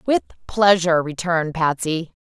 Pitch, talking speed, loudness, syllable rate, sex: 170 Hz, 110 wpm, -19 LUFS, 5.1 syllables/s, female